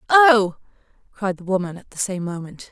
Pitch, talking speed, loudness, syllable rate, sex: 200 Hz, 175 wpm, -20 LUFS, 5.1 syllables/s, female